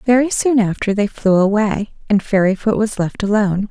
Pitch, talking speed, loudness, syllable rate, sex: 210 Hz, 180 wpm, -16 LUFS, 5.2 syllables/s, female